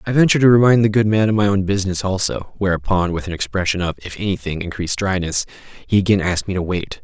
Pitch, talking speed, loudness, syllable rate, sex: 95 Hz, 230 wpm, -18 LUFS, 6.7 syllables/s, male